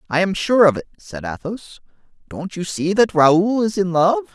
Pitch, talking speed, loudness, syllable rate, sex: 180 Hz, 205 wpm, -18 LUFS, 4.6 syllables/s, male